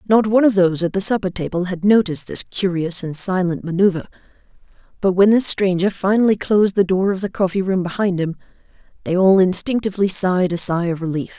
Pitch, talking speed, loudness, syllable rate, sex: 185 Hz, 195 wpm, -18 LUFS, 6.2 syllables/s, female